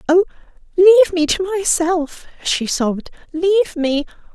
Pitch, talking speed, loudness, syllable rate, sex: 340 Hz, 125 wpm, -16 LUFS, 4.7 syllables/s, female